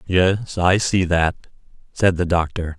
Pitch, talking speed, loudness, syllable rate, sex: 90 Hz, 150 wpm, -19 LUFS, 3.9 syllables/s, male